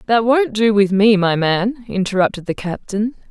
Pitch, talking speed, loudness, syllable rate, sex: 210 Hz, 180 wpm, -17 LUFS, 4.7 syllables/s, female